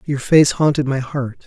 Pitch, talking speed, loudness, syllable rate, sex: 140 Hz, 205 wpm, -17 LUFS, 4.4 syllables/s, male